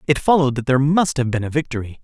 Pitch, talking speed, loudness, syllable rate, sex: 135 Hz, 265 wpm, -18 LUFS, 7.5 syllables/s, male